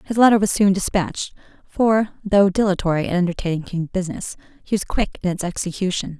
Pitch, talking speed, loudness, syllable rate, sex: 190 Hz, 165 wpm, -20 LUFS, 5.9 syllables/s, female